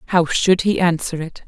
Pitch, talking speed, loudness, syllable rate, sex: 170 Hz, 205 wpm, -18 LUFS, 5.1 syllables/s, female